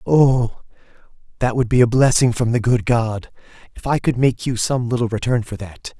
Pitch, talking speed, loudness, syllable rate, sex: 120 Hz, 200 wpm, -18 LUFS, 5.0 syllables/s, male